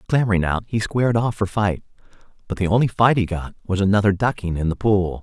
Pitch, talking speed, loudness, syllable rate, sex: 100 Hz, 220 wpm, -20 LUFS, 6.1 syllables/s, male